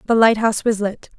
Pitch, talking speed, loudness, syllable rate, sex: 215 Hz, 205 wpm, -18 LUFS, 6.4 syllables/s, female